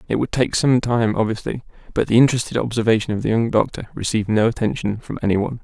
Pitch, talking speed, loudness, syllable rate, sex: 115 Hz, 215 wpm, -20 LUFS, 7.0 syllables/s, male